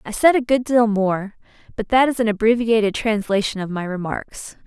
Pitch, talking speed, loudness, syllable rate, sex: 220 Hz, 195 wpm, -19 LUFS, 5.1 syllables/s, female